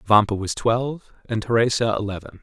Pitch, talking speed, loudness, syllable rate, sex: 110 Hz, 150 wpm, -22 LUFS, 5.6 syllables/s, male